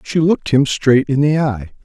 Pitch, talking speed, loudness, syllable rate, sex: 140 Hz, 230 wpm, -15 LUFS, 5.0 syllables/s, male